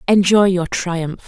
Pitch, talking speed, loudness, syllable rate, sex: 185 Hz, 140 wpm, -16 LUFS, 3.8 syllables/s, female